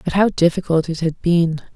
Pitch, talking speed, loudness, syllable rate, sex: 170 Hz, 205 wpm, -18 LUFS, 5.4 syllables/s, female